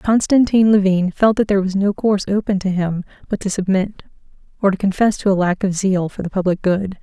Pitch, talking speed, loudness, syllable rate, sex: 195 Hz, 220 wpm, -17 LUFS, 5.7 syllables/s, female